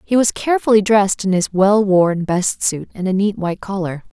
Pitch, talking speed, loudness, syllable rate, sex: 200 Hz, 215 wpm, -17 LUFS, 5.3 syllables/s, female